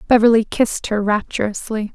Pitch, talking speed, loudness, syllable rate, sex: 220 Hz, 125 wpm, -18 LUFS, 5.6 syllables/s, female